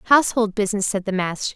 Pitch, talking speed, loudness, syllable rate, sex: 205 Hz, 190 wpm, -21 LUFS, 6.6 syllables/s, female